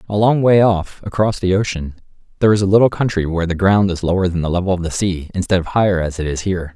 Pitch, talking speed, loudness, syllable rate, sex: 95 Hz, 265 wpm, -17 LUFS, 6.7 syllables/s, male